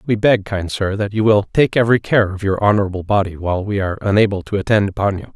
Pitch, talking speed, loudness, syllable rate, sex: 100 Hz, 245 wpm, -17 LUFS, 6.6 syllables/s, male